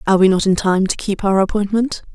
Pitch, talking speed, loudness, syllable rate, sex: 200 Hz, 250 wpm, -16 LUFS, 6.3 syllables/s, female